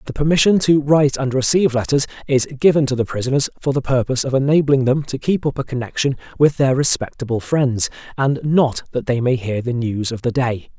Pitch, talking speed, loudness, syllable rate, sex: 135 Hz, 210 wpm, -18 LUFS, 5.8 syllables/s, male